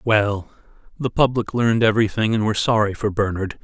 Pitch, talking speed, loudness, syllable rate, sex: 110 Hz, 165 wpm, -20 LUFS, 5.9 syllables/s, male